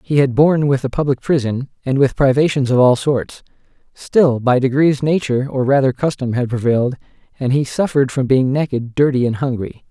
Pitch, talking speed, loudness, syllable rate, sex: 135 Hz, 190 wpm, -16 LUFS, 5.5 syllables/s, male